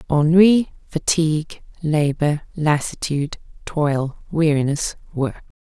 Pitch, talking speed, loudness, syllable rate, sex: 155 Hz, 75 wpm, -20 LUFS, 3.7 syllables/s, female